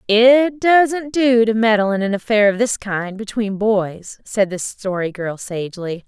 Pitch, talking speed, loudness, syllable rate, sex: 215 Hz, 180 wpm, -17 LUFS, 4.1 syllables/s, female